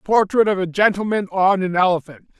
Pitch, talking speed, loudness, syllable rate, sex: 190 Hz, 175 wpm, -18 LUFS, 5.4 syllables/s, male